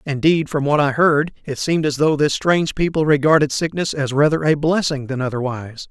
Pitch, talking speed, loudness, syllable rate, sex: 145 Hz, 205 wpm, -18 LUFS, 5.7 syllables/s, male